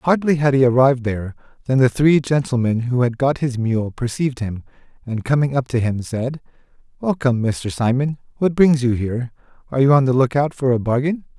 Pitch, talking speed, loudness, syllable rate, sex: 130 Hz, 200 wpm, -19 LUFS, 5.6 syllables/s, male